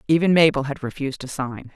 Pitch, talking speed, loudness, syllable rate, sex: 140 Hz, 205 wpm, -21 LUFS, 6.4 syllables/s, female